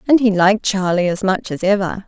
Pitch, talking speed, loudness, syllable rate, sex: 195 Hz, 230 wpm, -16 LUFS, 5.8 syllables/s, female